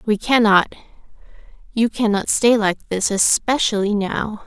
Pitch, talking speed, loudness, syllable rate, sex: 215 Hz, 120 wpm, -18 LUFS, 4.1 syllables/s, female